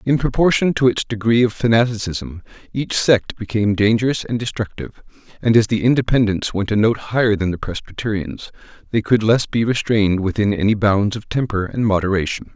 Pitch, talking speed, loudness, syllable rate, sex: 110 Hz, 170 wpm, -18 LUFS, 5.7 syllables/s, male